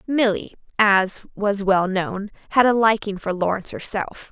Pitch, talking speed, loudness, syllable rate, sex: 205 Hz, 155 wpm, -20 LUFS, 4.4 syllables/s, female